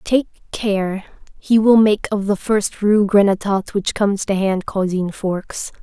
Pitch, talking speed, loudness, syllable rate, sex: 200 Hz, 165 wpm, -18 LUFS, 4.1 syllables/s, female